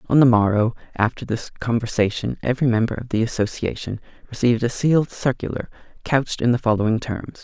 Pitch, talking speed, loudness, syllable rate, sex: 120 Hz, 160 wpm, -21 LUFS, 6.1 syllables/s, male